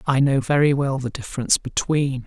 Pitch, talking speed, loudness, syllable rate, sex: 135 Hz, 185 wpm, -21 LUFS, 5.6 syllables/s, male